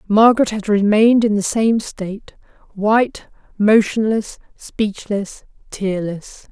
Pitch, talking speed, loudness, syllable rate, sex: 210 Hz, 100 wpm, -17 LUFS, 4.0 syllables/s, female